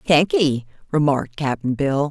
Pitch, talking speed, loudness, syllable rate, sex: 150 Hz, 115 wpm, -20 LUFS, 4.1 syllables/s, female